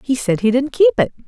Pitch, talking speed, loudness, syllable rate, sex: 265 Hz, 285 wpm, -16 LUFS, 5.7 syllables/s, female